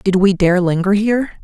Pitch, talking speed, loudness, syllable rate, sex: 195 Hz, 210 wpm, -15 LUFS, 5.4 syllables/s, female